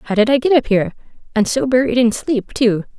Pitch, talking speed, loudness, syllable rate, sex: 235 Hz, 220 wpm, -16 LUFS, 5.7 syllables/s, female